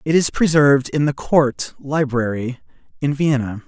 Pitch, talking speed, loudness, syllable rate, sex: 140 Hz, 145 wpm, -18 LUFS, 4.9 syllables/s, male